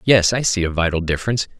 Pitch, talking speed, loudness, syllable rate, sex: 100 Hz, 225 wpm, -18 LUFS, 7.1 syllables/s, male